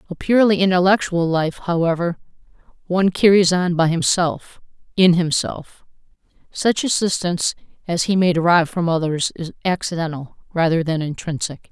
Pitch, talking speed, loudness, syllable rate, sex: 175 Hz, 130 wpm, -18 LUFS, 5.2 syllables/s, female